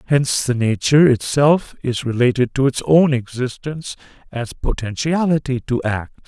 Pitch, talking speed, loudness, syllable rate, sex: 130 Hz, 135 wpm, -18 LUFS, 5.0 syllables/s, male